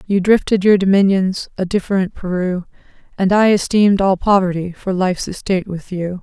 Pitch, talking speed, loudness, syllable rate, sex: 190 Hz, 165 wpm, -16 LUFS, 5.4 syllables/s, female